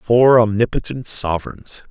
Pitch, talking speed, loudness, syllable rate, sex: 110 Hz, 95 wpm, -17 LUFS, 4.4 syllables/s, male